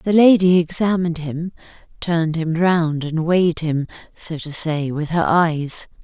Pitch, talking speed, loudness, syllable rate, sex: 165 Hz, 160 wpm, -19 LUFS, 4.3 syllables/s, female